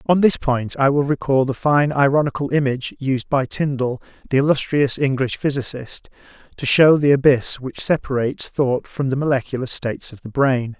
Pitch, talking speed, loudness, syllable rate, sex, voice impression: 135 Hz, 170 wpm, -19 LUFS, 5.2 syllables/s, male, very masculine, adult-like, slightly middle-aged, thick, slightly tensed, weak, slightly dark, hard, slightly clear, fluent, slightly cool, intellectual, slightly refreshing, sincere, very calm, friendly, reassuring, slightly unique, elegant, slightly wild, slightly sweet, slightly lively, kind, slightly intense, slightly modest